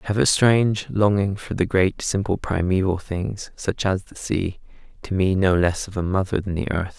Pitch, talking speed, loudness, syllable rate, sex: 95 Hz, 215 wpm, -22 LUFS, 4.9 syllables/s, male